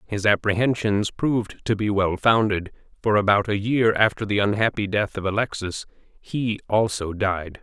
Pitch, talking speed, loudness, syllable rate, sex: 105 Hz, 155 wpm, -22 LUFS, 4.8 syllables/s, male